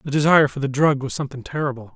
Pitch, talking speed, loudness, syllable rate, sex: 140 Hz, 245 wpm, -20 LUFS, 7.7 syllables/s, male